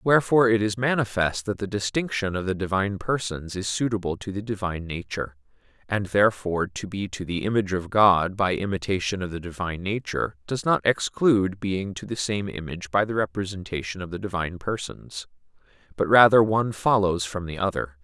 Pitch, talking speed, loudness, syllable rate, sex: 100 Hz, 180 wpm, -24 LUFS, 5.8 syllables/s, male